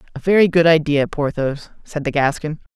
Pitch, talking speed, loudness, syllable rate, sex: 155 Hz, 175 wpm, -17 LUFS, 5.4 syllables/s, male